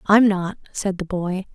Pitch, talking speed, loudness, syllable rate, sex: 190 Hz, 195 wpm, -22 LUFS, 4.0 syllables/s, female